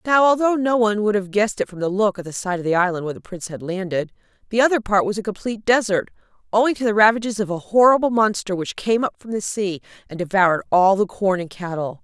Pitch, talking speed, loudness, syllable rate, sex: 205 Hz, 250 wpm, -20 LUFS, 6.5 syllables/s, female